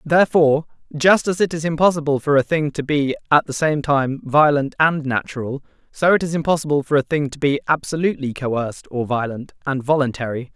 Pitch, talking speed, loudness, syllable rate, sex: 145 Hz, 190 wpm, -19 LUFS, 5.7 syllables/s, male